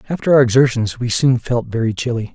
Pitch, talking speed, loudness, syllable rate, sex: 120 Hz, 205 wpm, -16 LUFS, 6.1 syllables/s, male